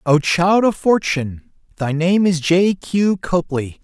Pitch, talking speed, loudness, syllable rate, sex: 175 Hz, 155 wpm, -17 LUFS, 3.8 syllables/s, male